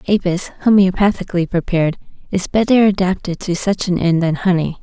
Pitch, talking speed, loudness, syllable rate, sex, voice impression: 185 Hz, 150 wpm, -16 LUFS, 6.0 syllables/s, female, feminine, adult-like, slightly calm, slightly kind